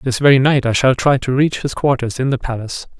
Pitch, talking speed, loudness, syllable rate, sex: 130 Hz, 260 wpm, -16 LUFS, 6.0 syllables/s, male